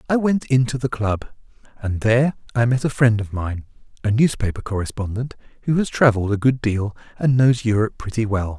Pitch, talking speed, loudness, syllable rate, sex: 115 Hz, 175 wpm, -20 LUFS, 5.7 syllables/s, male